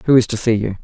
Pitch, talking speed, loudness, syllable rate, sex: 115 Hz, 360 wpm, -17 LUFS, 6.5 syllables/s, male